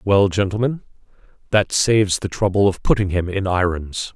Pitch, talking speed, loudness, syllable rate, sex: 95 Hz, 160 wpm, -19 LUFS, 5.0 syllables/s, male